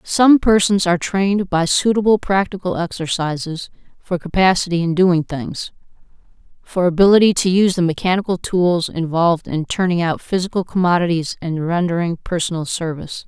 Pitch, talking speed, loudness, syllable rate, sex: 180 Hz, 135 wpm, -17 LUFS, 5.4 syllables/s, female